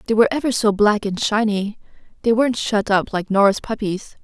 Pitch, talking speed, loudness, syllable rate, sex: 210 Hz, 200 wpm, -19 LUFS, 5.6 syllables/s, female